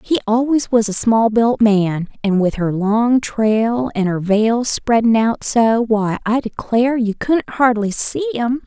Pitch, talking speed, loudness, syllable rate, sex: 225 Hz, 180 wpm, -16 LUFS, 3.9 syllables/s, female